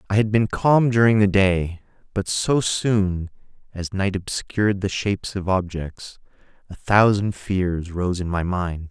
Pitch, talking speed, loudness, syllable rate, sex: 95 Hz, 160 wpm, -21 LUFS, 4.3 syllables/s, male